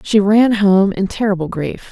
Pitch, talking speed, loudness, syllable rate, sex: 200 Hz, 190 wpm, -15 LUFS, 4.4 syllables/s, female